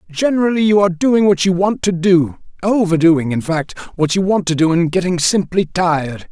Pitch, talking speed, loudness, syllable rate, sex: 175 Hz, 190 wpm, -15 LUFS, 5.3 syllables/s, male